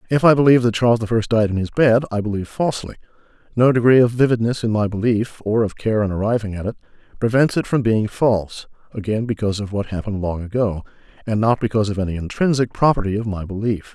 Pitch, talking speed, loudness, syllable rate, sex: 110 Hz, 215 wpm, -19 LUFS, 6.7 syllables/s, male